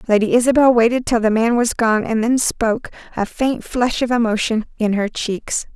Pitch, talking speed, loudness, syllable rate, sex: 230 Hz, 200 wpm, -17 LUFS, 5.1 syllables/s, female